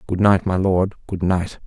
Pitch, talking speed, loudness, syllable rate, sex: 95 Hz, 215 wpm, -19 LUFS, 4.4 syllables/s, male